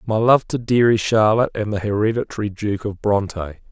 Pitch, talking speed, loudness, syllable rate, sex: 105 Hz, 180 wpm, -19 LUFS, 5.7 syllables/s, male